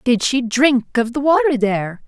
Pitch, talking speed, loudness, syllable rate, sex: 250 Hz, 205 wpm, -17 LUFS, 4.7 syllables/s, female